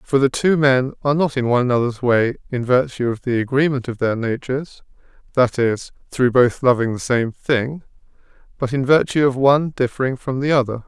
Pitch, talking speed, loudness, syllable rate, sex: 130 Hz, 195 wpm, -19 LUFS, 5.5 syllables/s, male